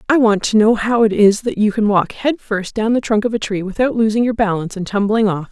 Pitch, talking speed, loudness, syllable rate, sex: 215 Hz, 285 wpm, -16 LUFS, 5.8 syllables/s, female